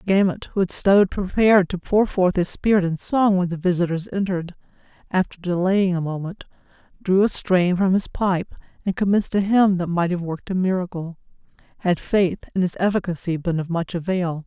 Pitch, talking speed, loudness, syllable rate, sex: 185 Hz, 185 wpm, -21 LUFS, 5.4 syllables/s, female